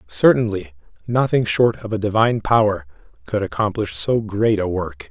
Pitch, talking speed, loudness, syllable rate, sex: 110 Hz, 155 wpm, -19 LUFS, 5.0 syllables/s, male